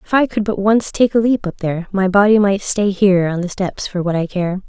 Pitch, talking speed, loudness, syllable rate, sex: 195 Hz, 280 wpm, -16 LUFS, 5.6 syllables/s, female